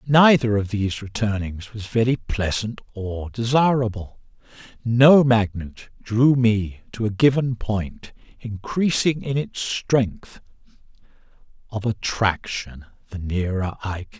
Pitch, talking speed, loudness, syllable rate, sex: 110 Hz, 115 wpm, -21 LUFS, 3.9 syllables/s, male